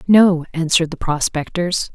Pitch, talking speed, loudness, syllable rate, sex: 170 Hz, 125 wpm, -17 LUFS, 4.6 syllables/s, female